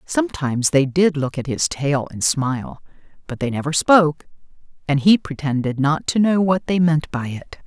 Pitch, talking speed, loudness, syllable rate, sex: 150 Hz, 190 wpm, -19 LUFS, 5.0 syllables/s, female